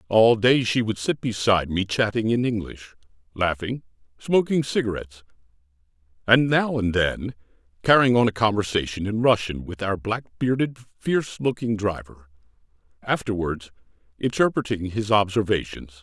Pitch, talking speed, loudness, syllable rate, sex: 105 Hz, 125 wpm, -23 LUFS, 5.0 syllables/s, male